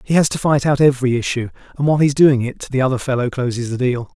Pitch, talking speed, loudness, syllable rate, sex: 130 Hz, 275 wpm, -17 LUFS, 6.9 syllables/s, male